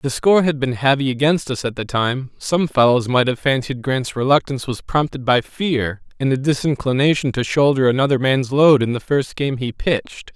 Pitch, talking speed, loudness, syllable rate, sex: 135 Hz, 210 wpm, -18 LUFS, 5.3 syllables/s, male